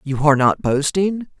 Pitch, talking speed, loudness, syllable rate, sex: 155 Hz, 170 wpm, -17 LUFS, 5.0 syllables/s, female